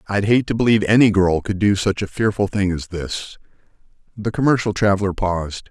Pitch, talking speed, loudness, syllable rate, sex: 100 Hz, 190 wpm, -19 LUFS, 5.7 syllables/s, male